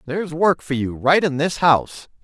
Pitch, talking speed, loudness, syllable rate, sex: 155 Hz, 215 wpm, -19 LUFS, 5.1 syllables/s, male